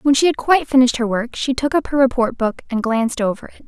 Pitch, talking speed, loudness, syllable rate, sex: 255 Hz, 280 wpm, -18 LUFS, 6.7 syllables/s, female